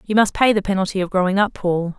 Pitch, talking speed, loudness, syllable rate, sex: 195 Hz, 270 wpm, -19 LUFS, 6.4 syllables/s, female